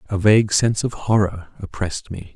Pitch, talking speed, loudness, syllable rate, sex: 100 Hz, 180 wpm, -19 LUFS, 5.8 syllables/s, male